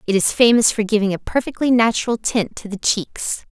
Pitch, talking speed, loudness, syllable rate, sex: 220 Hz, 205 wpm, -18 LUFS, 5.5 syllables/s, female